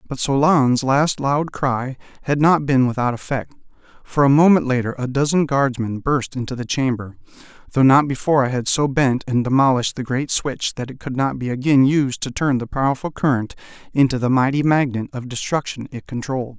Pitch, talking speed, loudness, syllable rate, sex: 135 Hz, 190 wpm, -19 LUFS, 5.4 syllables/s, male